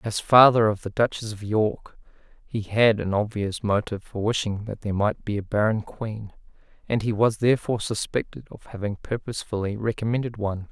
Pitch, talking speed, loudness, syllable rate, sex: 105 Hz, 175 wpm, -24 LUFS, 5.4 syllables/s, male